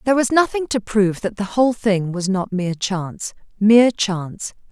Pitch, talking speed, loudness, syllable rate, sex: 210 Hz, 190 wpm, -19 LUFS, 5.5 syllables/s, female